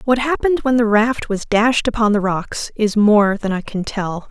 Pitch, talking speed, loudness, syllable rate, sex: 220 Hz, 225 wpm, -17 LUFS, 4.6 syllables/s, female